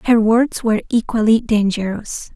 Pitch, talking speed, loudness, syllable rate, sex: 220 Hz, 130 wpm, -17 LUFS, 4.9 syllables/s, female